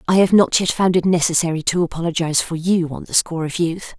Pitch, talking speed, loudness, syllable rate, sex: 170 Hz, 240 wpm, -18 LUFS, 6.3 syllables/s, female